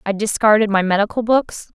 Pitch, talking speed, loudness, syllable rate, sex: 210 Hz, 165 wpm, -16 LUFS, 5.6 syllables/s, female